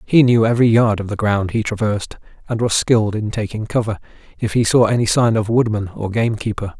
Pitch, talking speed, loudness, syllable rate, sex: 110 Hz, 210 wpm, -17 LUFS, 6.1 syllables/s, male